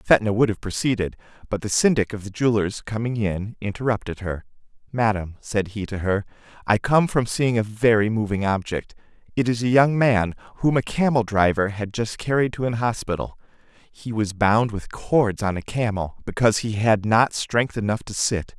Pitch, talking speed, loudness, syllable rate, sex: 110 Hz, 185 wpm, -22 LUFS, 5.1 syllables/s, male